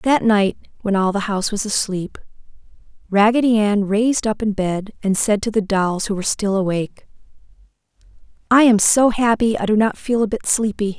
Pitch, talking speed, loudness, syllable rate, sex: 210 Hz, 185 wpm, -18 LUFS, 5.3 syllables/s, female